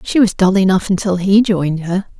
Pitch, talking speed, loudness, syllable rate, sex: 190 Hz, 220 wpm, -14 LUFS, 5.5 syllables/s, female